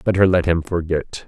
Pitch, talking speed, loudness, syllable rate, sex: 90 Hz, 190 wpm, -19 LUFS, 5.1 syllables/s, male